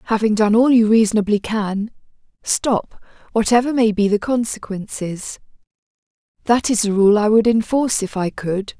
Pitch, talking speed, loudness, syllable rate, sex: 215 Hz, 150 wpm, -17 LUFS, 4.9 syllables/s, female